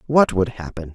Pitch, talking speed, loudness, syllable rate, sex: 105 Hz, 190 wpm, -19 LUFS, 5.1 syllables/s, male